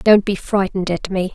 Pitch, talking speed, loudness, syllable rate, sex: 195 Hz, 225 wpm, -19 LUFS, 5.3 syllables/s, female